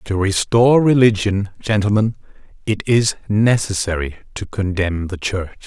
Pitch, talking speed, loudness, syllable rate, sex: 105 Hz, 115 wpm, -17 LUFS, 4.5 syllables/s, male